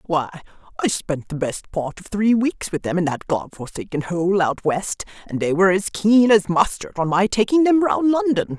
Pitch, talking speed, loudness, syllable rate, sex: 190 Hz, 210 wpm, -20 LUFS, 4.7 syllables/s, female